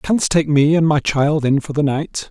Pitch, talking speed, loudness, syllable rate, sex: 150 Hz, 260 wpm, -16 LUFS, 4.4 syllables/s, male